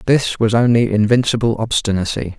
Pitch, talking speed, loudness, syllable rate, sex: 115 Hz, 125 wpm, -16 LUFS, 5.4 syllables/s, male